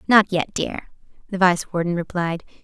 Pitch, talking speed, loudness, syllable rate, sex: 180 Hz, 160 wpm, -21 LUFS, 5.0 syllables/s, female